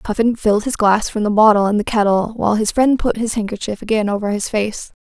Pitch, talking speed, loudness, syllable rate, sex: 215 Hz, 240 wpm, -17 LUFS, 6.0 syllables/s, female